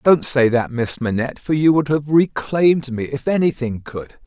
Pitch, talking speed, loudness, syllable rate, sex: 135 Hz, 195 wpm, -18 LUFS, 4.8 syllables/s, male